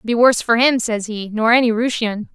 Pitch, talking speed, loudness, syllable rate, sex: 230 Hz, 230 wpm, -17 LUFS, 5.5 syllables/s, female